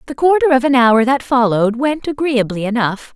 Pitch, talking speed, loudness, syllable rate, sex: 250 Hz, 190 wpm, -15 LUFS, 5.4 syllables/s, female